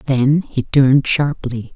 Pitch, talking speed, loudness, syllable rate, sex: 135 Hz, 135 wpm, -16 LUFS, 3.5 syllables/s, female